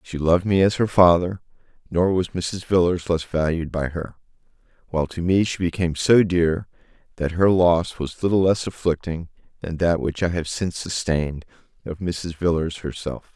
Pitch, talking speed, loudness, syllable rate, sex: 85 Hz, 175 wpm, -22 LUFS, 5.0 syllables/s, male